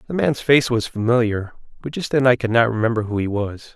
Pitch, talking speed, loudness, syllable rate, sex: 115 Hz, 240 wpm, -19 LUFS, 5.8 syllables/s, male